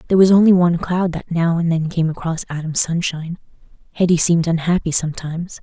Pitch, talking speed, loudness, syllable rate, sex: 170 Hz, 180 wpm, -17 LUFS, 6.4 syllables/s, female